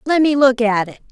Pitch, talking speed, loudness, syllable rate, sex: 250 Hz, 215 wpm, -15 LUFS, 5.4 syllables/s, female